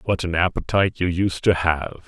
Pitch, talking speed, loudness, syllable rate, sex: 90 Hz, 205 wpm, -21 LUFS, 5.4 syllables/s, male